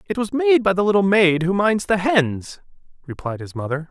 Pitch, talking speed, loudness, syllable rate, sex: 170 Hz, 215 wpm, -19 LUFS, 5.1 syllables/s, male